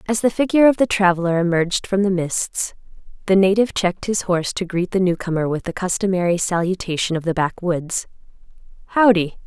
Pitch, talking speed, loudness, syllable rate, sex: 185 Hz, 170 wpm, -19 LUFS, 6.0 syllables/s, female